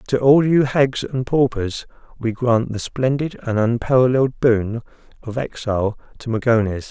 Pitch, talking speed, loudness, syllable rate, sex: 120 Hz, 150 wpm, -19 LUFS, 4.6 syllables/s, male